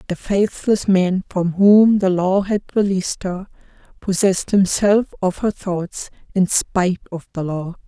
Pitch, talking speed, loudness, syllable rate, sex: 190 Hz, 150 wpm, -18 LUFS, 4.2 syllables/s, female